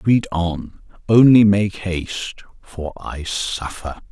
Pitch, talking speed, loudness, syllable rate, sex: 95 Hz, 115 wpm, -18 LUFS, 3.3 syllables/s, male